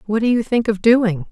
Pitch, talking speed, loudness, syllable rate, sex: 220 Hz, 275 wpm, -17 LUFS, 5.1 syllables/s, female